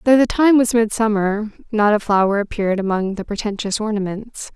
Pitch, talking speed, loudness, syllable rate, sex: 215 Hz, 170 wpm, -18 LUFS, 5.5 syllables/s, female